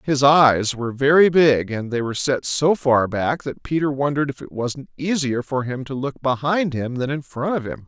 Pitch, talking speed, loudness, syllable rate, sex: 135 Hz, 230 wpm, -20 LUFS, 4.9 syllables/s, male